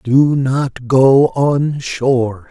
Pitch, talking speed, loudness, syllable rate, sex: 130 Hz, 120 wpm, -14 LUFS, 2.4 syllables/s, male